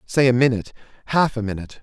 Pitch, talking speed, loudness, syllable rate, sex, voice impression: 120 Hz, 165 wpm, -20 LUFS, 7.5 syllables/s, male, masculine, adult-like, tensed, slightly bright, clear, fluent, intellectual, sincere, friendly, lively, kind, slightly strict